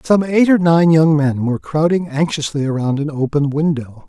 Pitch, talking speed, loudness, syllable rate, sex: 155 Hz, 190 wpm, -16 LUFS, 4.8 syllables/s, male